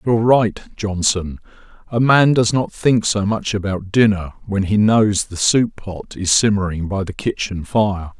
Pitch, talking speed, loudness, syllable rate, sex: 105 Hz, 175 wpm, -17 LUFS, 4.3 syllables/s, male